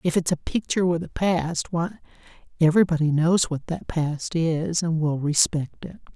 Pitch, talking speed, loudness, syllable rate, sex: 165 Hz, 175 wpm, -23 LUFS, 4.8 syllables/s, female